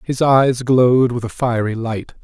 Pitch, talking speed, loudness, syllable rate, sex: 120 Hz, 190 wpm, -16 LUFS, 4.4 syllables/s, male